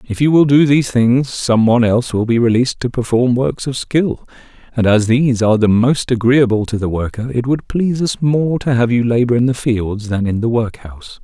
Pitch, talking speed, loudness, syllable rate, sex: 120 Hz, 230 wpm, -15 LUFS, 5.5 syllables/s, male